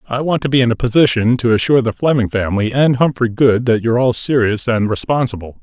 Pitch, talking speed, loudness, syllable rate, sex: 120 Hz, 225 wpm, -15 LUFS, 6.5 syllables/s, male